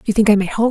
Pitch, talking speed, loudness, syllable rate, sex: 215 Hz, 425 wpm, -15 LUFS, 7.6 syllables/s, female